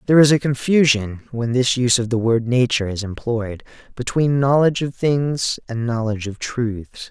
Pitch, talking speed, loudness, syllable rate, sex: 125 Hz, 175 wpm, -19 LUFS, 5.1 syllables/s, male